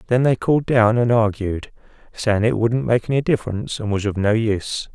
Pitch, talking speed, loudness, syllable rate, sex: 110 Hz, 205 wpm, -19 LUFS, 5.5 syllables/s, male